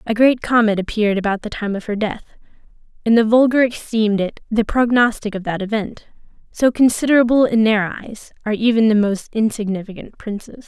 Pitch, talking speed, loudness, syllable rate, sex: 220 Hz, 175 wpm, -17 LUFS, 5.7 syllables/s, female